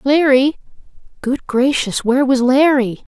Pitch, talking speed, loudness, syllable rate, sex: 265 Hz, 115 wpm, -15 LUFS, 4.3 syllables/s, female